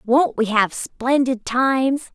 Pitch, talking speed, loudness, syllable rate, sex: 255 Hz, 140 wpm, -19 LUFS, 3.5 syllables/s, female